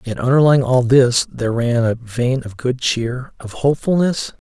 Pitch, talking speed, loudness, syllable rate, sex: 125 Hz, 175 wpm, -17 LUFS, 4.5 syllables/s, male